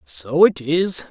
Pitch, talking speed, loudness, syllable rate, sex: 150 Hz, 165 wpm, -18 LUFS, 3.0 syllables/s, male